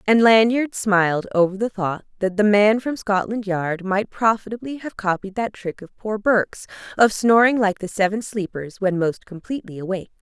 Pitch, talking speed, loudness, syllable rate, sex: 205 Hz, 180 wpm, -20 LUFS, 5.1 syllables/s, female